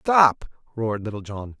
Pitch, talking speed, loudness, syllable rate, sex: 120 Hz, 150 wpm, -22 LUFS, 4.7 syllables/s, male